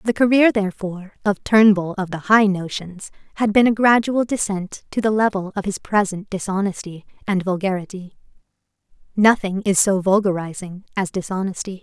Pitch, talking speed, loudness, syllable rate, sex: 195 Hz, 145 wpm, -19 LUFS, 5.3 syllables/s, female